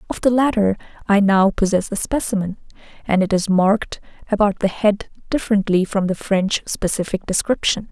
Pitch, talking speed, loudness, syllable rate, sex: 200 Hz, 160 wpm, -19 LUFS, 5.3 syllables/s, female